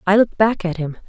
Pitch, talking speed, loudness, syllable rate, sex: 195 Hz, 280 wpm, -18 LUFS, 6.9 syllables/s, female